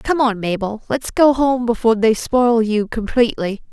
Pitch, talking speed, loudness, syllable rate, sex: 230 Hz, 175 wpm, -17 LUFS, 4.8 syllables/s, female